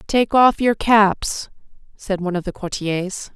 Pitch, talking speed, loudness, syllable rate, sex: 200 Hz, 160 wpm, -19 LUFS, 4.0 syllables/s, female